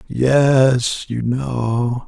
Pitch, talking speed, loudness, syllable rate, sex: 120 Hz, 85 wpm, -17 LUFS, 1.6 syllables/s, male